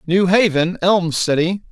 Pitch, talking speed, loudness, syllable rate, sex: 180 Hz, 140 wpm, -16 LUFS, 4.1 syllables/s, male